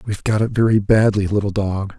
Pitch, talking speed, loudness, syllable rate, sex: 105 Hz, 210 wpm, -18 LUFS, 6.0 syllables/s, male